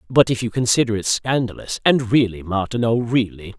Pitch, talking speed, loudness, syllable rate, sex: 115 Hz, 150 wpm, -19 LUFS, 5.4 syllables/s, male